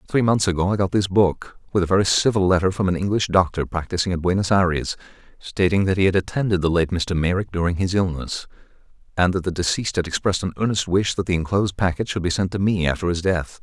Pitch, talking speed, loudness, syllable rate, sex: 95 Hz, 235 wpm, -21 LUFS, 6.4 syllables/s, male